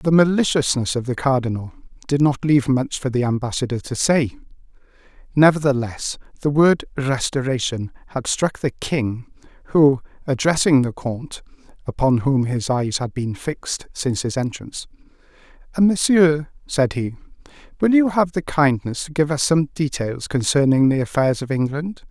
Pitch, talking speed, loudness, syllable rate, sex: 135 Hz, 145 wpm, -20 LUFS, 4.9 syllables/s, male